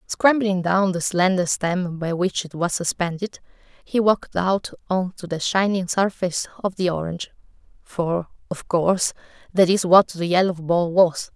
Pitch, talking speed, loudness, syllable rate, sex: 180 Hz, 165 wpm, -21 LUFS, 4.6 syllables/s, female